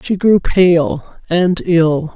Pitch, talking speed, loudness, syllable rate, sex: 175 Hz, 140 wpm, -14 LUFS, 2.7 syllables/s, female